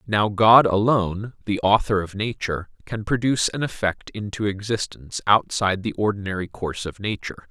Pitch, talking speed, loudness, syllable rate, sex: 105 Hz, 150 wpm, -22 LUFS, 5.6 syllables/s, male